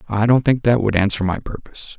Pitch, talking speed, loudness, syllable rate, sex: 110 Hz, 240 wpm, -18 LUFS, 6.1 syllables/s, male